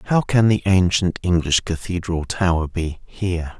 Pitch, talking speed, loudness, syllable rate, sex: 90 Hz, 150 wpm, -20 LUFS, 4.4 syllables/s, male